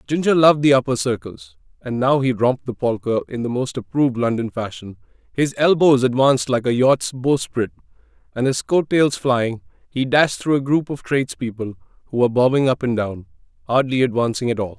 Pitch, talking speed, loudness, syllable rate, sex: 130 Hz, 185 wpm, -19 LUFS, 5.6 syllables/s, male